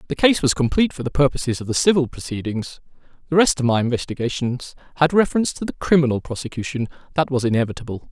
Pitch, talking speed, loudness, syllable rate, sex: 135 Hz, 185 wpm, -20 LUFS, 7.0 syllables/s, male